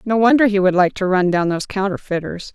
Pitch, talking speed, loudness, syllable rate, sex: 195 Hz, 235 wpm, -17 LUFS, 6.1 syllables/s, female